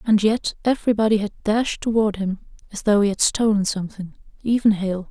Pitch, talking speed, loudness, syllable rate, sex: 210 Hz, 165 wpm, -21 LUFS, 5.5 syllables/s, female